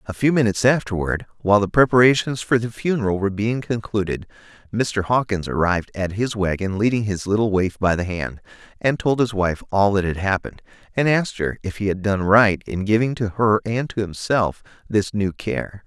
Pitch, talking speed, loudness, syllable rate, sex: 105 Hz, 195 wpm, -21 LUFS, 5.4 syllables/s, male